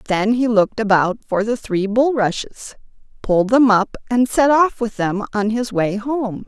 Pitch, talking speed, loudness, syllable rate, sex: 220 Hz, 185 wpm, -18 LUFS, 4.3 syllables/s, female